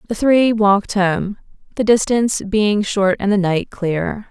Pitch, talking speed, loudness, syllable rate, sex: 205 Hz, 165 wpm, -17 LUFS, 4.1 syllables/s, female